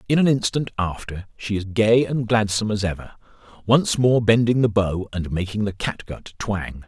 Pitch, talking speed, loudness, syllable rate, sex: 105 Hz, 185 wpm, -21 LUFS, 4.9 syllables/s, male